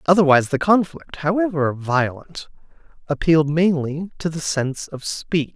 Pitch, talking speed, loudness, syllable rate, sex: 155 Hz, 130 wpm, -20 LUFS, 4.8 syllables/s, male